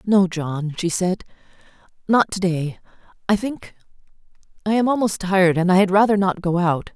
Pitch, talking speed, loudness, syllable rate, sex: 190 Hz, 175 wpm, -20 LUFS, 5.1 syllables/s, female